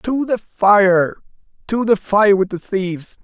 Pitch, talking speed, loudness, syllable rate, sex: 200 Hz, 165 wpm, -16 LUFS, 3.8 syllables/s, male